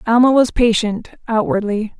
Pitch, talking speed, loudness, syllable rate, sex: 225 Hz, 90 wpm, -16 LUFS, 4.7 syllables/s, female